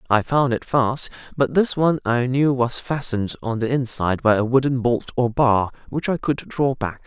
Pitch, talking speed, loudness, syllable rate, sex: 125 Hz, 210 wpm, -21 LUFS, 5.0 syllables/s, male